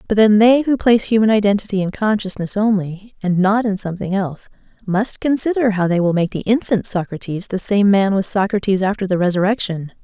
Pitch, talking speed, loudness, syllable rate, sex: 200 Hz, 190 wpm, -17 LUFS, 5.8 syllables/s, female